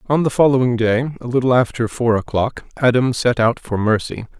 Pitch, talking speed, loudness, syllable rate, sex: 120 Hz, 190 wpm, -17 LUFS, 5.3 syllables/s, male